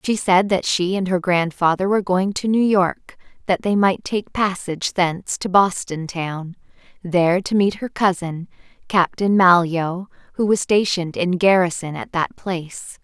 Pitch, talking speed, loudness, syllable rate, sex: 185 Hz, 165 wpm, -19 LUFS, 4.5 syllables/s, female